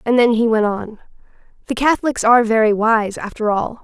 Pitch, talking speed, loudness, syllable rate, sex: 225 Hz, 190 wpm, -16 LUFS, 5.6 syllables/s, female